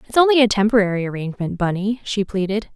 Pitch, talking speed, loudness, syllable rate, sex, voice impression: 210 Hz, 175 wpm, -19 LUFS, 6.7 syllables/s, female, feminine, adult-like, relaxed, slightly weak, soft, fluent, slightly raspy, slightly cute, friendly, reassuring, elegant, kind, modest